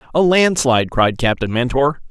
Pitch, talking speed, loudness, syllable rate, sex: 135 Hz, 145 wpm, -16 LUFS, 5.2 syllables/s, male